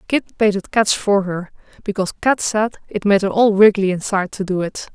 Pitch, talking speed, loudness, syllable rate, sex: 200 Hz, 205 wpm, -18 LUFS, 5.3 syllables/s, female